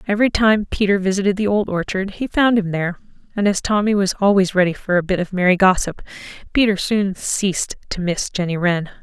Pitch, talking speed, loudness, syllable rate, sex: 195 Hz, 200 wpm, -18 LUFS, 5.8 syllables/s, female